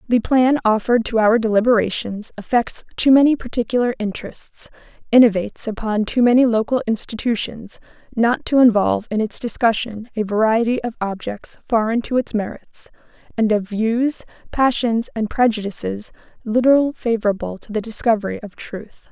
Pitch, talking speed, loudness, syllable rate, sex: 225 Hz, 140 wpm, -19 LUFS, 5.2 syllables/s, female